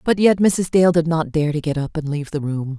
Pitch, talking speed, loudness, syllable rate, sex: 160 Hz, 300 wpm, -19 LUFS, 5.6 syllables/s, female